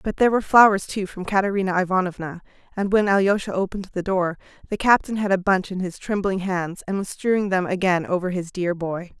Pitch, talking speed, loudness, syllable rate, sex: 190 Hz, 210 wpm, -22 LUFS, 6.0 syllables/s, female